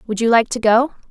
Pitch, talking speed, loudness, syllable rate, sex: 230 Hz, 270 wpm, -16 LUFS, 6.1 syllables/s, female